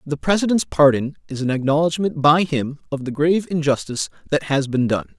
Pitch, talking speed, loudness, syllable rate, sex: 150 Hz, 185 wpm, -19 LUFS, 5.7 syllables/s, male